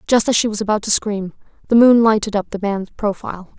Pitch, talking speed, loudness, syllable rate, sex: 210 Hz, 235 wpm, -16 LUFS, 5.9 syllables/s, female